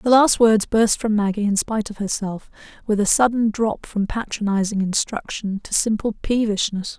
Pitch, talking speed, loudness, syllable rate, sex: 215 Hz, 170 wpm, -20 LUFS, 4.9 syllables/s, female